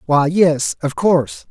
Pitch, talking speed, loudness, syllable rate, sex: 150 Hz, 160 wpm, -16 LUFS, 3.8 syllables/s, male